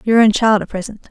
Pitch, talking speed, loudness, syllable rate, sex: 210 Hz, 270 wpm, -14 LUFS, 5.9 syllables/s, female